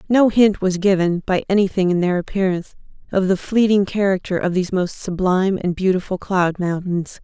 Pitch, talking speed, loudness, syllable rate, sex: 190 Hz, 175 wpm, -19 LUFS, 5.4 syllables/s, female